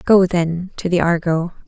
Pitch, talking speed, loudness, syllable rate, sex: 175 Hz, 180 wpm, -18 LUFS, 4.3 syllables/s, female